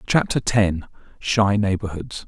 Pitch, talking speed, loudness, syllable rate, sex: 100 Hz, 80 wpm, -21 LUFS, 3.9 syllables/s, male